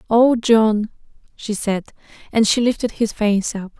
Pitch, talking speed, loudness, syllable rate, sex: 220 Hz, 160 wpm, -18 LUFS, 4.2 syllables/s, female